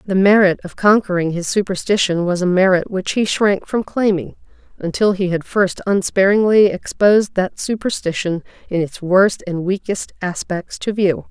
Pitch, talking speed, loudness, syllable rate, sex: 190 Hz, 160 wpm, -17 LUFS, 4.7 syllables/s, female